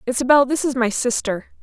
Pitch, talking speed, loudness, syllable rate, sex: 250 Hz, 185 wpm, -19 LUFS, 6.0 syllables/s, female